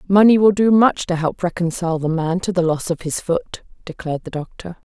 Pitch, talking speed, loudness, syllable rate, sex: 175 Hz, 220 wpm, -18 LUFS, 5.6 syllables/s, female